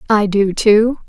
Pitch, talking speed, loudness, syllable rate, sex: 210 Hz, 165 wpm, -14 LUFS, 3.5 syllables/s, female